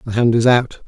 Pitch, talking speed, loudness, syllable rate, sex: 120 Hz, 275 wpm, -15 LUFS, 5.6 syllables/s, male